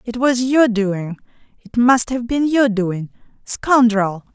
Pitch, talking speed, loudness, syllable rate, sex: 230 Hz, 150 wpm, -17 LUFS, 3.6 syllables/s, female